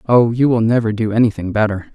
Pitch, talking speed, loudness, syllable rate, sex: 110 Hz, 215 wpm, -16 LUFS, 6.1 syllables/s, male